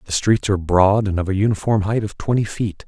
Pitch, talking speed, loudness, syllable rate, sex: 100 Hz, 250 wpm, -19 LUFS, 5.9 syllables/s, male